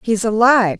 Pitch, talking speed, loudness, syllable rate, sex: 225 Hz, 230 wpm, -14 LUFS, 7.3 syllables/s, female